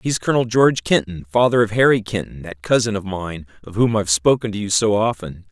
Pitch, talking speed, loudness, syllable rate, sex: 105 Hz, 220 wpm, -18 LUFS, 5.9 syllables/s, male